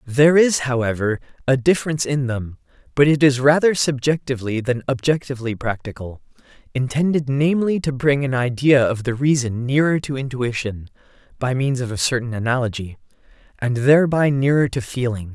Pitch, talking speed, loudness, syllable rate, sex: 130 Hz, 150 wpm, -19 LUFS, 5.4 syllables/s, male